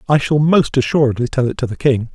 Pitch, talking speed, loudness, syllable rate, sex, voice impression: 135 Hz, 250 wpm, -16 LUFS, 6.1 syllables/s, male, masculine, adult-like, slightly thick, cool, sincere, slightly calm, reassuring, slightly elegant